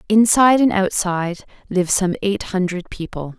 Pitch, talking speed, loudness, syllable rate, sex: 195 Hz, 140 wpm, -18 LUFS, 5.2 syllables/s, female